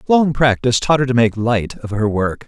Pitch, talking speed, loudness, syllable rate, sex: 120 Hz, 240 wpm, -16 LUFS, 5.2 syllables/s, male